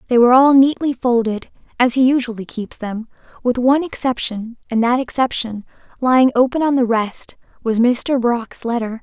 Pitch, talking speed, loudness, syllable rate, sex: 245 Hz, 165 wpm, -17 LUFS, 4.6 syllables/s, female